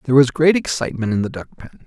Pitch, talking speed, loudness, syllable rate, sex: 135 Hz, 260 wpm, -18 LUFS, 7.4 syllables/s, male